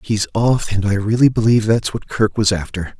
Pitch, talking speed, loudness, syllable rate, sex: 105 Hz, 220 wpm, -17 LUFS, 5.3 syllables/s, male